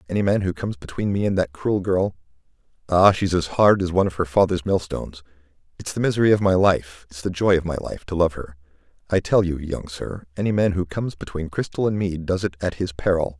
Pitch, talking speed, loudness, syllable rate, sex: 90 Hz, 230 wpm, -22 LUFS, 6.0 syllables/s, male